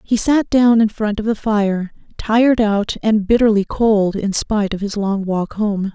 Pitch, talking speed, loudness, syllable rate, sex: 210 Hz, 200 wpm, -17 LUFS, 4.3 syllables/s, female